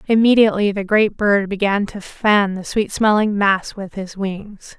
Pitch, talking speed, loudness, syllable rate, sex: 200 Hz, 175 wpm, -17 LUFS, 4.3 syllables/s, female